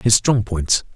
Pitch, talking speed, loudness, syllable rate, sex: 105 Hz, 190 wpm, -18 LUFS, 3.6 syllables/s, male